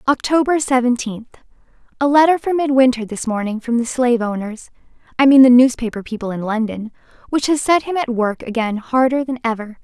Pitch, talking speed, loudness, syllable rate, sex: 245 Hz, 160 wpm, -17 LUFS, 5.7 syllables/s, female